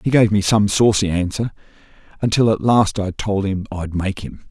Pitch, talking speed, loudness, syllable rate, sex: 100 Hz, 200 wpm, -18 LUFS, 4.9 syllables/s, male